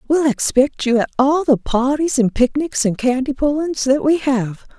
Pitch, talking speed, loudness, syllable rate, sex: 270 Hz, 190 wpm, -17 LUFS, 4.6 syllables/s, female